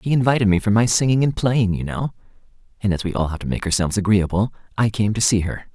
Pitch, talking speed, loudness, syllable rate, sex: 105 Hz, 250 wpm, -20 LUFS, 6.5 syllables/s, male